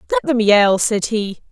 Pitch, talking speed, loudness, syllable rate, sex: 220 Hz, 200 wpm, -16 LUFS, 5.3 syllables/s, female